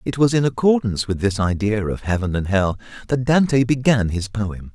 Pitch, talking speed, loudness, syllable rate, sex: 110 Hz, 200 wpm, -20 LUFS, 5.3 syllables/s, male